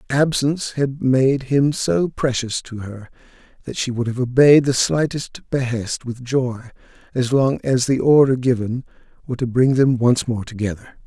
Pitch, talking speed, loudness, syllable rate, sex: 125 Hz, 170 wpm, -19 LUFS, 4.5 syllables/s, male